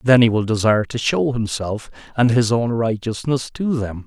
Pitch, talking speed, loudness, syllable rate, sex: 120 Hz, 190 wpm, -19 LUFS, 4.8 syllables/s, male